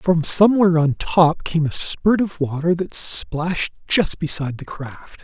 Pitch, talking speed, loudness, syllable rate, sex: 165 Hz, 170 wpm, -18 LUFS, 4.4 syllables/s, male